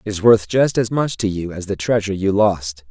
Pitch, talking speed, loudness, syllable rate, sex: 100 Hz, 270 wpm, -18 LUFS, 5.4 syllables/s, male